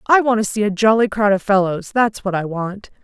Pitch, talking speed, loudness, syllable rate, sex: 210 Hz, 255 wpm, -17 LUFS, 5.4 syllables/s, female